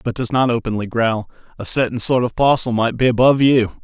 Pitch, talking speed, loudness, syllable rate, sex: 120 Hz, 220 wpm, -17 LUFS, 5.8 syllables/s, male